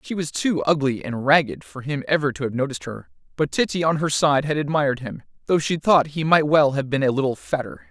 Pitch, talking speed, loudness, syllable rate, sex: 145 Hz, 245 wpm, -21 LUFS, 5.8 syllables/s, male